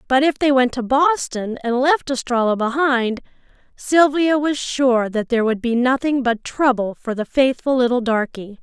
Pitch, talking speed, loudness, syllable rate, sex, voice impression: 255 Hz, 175 wpm, -18 LUFS, 4.6 syllables/s, female, very feminine, young, slightly adult-like, very thin, slightly tensed, slightly weak, bright, slightly soft, slightly clear, slightly fluent, very cute, intellectual, refreshing, sincere, very calm, friendly, reassuring, very unique, elegant, sweet, slightly lively, kind, slightly intense, sharp, slightly modest, light